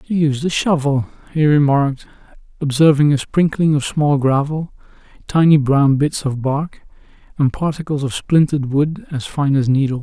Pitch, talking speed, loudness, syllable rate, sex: 145 Hz, 155 wpm, -17 LUFS, 4.8 syllables/s, male